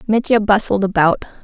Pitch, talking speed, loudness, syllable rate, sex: 205 Hz, 125 wpm, -15 LUFS, 5.3 syllables/s, female